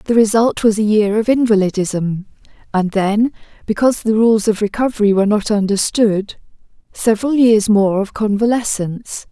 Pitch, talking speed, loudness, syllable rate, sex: 215 Hz, 140 wpm, -15 LUFS, 5.0 syllables/s, female